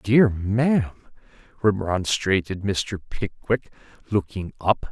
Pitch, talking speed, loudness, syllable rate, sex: 105 Hz, 100 wpm, -23 LUFS, 3.7 syllables/s, male